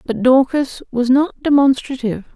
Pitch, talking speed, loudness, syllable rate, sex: 265 Hz, 130 wpm, -16 LUFS, 5.1 syllables/s, female